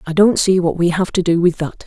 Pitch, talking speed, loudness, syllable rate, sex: 175 Hz, 320 wpm, -16 LUFS, 5.7 syllables/s, female